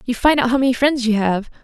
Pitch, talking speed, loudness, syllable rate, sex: 245 Hz, 295 wpm, -17 LUFS, 6.3 syllables/s, female